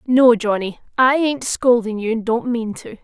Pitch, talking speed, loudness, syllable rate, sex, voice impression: 240 Hz, 200 wpm, -18 LUFS, 4.5 syllables/s, female, feminine, slightly young, slightly clear, unique